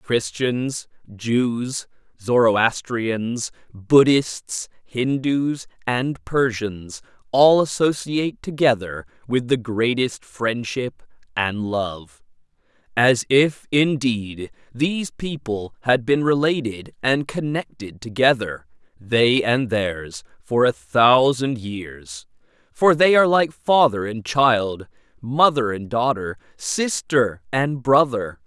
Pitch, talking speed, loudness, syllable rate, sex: 120 Hz, 100 wpm, -20 LUFS, 3.2 syllables/s, male